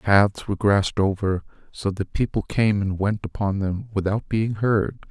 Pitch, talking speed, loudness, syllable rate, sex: 100 Hz, 190 wpm, -23 LUFS, 4.8 syllables/s, male